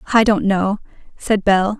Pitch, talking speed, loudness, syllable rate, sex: 205 Hz, 165 wpm, -17 LUFS, 4.2 syllables/s, female